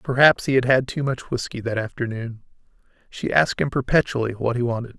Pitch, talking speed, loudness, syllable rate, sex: 125 Hz, 195 wpm, -22 LUFS, 6.0 syllables/s, male